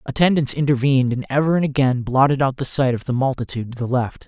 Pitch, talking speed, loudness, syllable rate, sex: 135 Hz, 225 wpm, -19 LUFS, 6.5 syllables/s, male